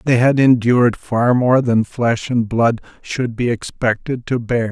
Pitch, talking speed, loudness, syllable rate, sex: 120 Hz, 180 wpm, -17 LUFS, 4.0 syllables/s, male